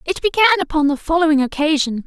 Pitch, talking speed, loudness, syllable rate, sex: 310 Hz, 175 wpm, -16 LUFS, 6.7 syllables/s, female